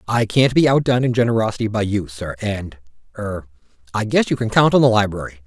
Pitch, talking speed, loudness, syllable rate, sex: 110 Hz, 200 wpm, -18 LUFS, 6.1 syllables/s, male